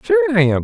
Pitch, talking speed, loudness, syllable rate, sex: 160 Hz, 285 wpm, -15 LUFS, 5.2 syllables/s, male